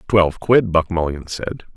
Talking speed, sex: 170 wpm, male